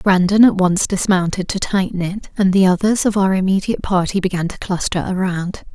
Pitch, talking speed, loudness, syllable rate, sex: 190 Hz, 190 wpm, -17 LUFS, 5.4 syllables/s, female